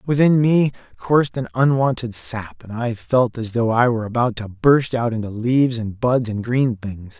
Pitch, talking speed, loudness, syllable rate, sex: 120 Hz, 200 wpm, -19 LUFS, 4.7 syllables/s, male